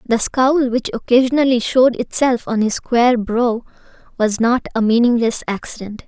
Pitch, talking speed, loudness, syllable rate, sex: 240 Hz, 150 wpm, -16 LUFS, 4.9 syllables/s, female